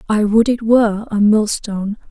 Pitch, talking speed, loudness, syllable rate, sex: 215 Hz, 170 wpm, -15 LUFS, 5.0 syllables/s, female